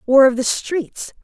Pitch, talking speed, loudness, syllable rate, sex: 270 Hz, 195 wpm, -17 LUFS, 3.8 syllables/s, female